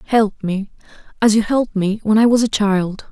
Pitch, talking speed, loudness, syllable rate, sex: 210 Hz, 210 wpm, -17 LUFS, 5.0 syllables/s, female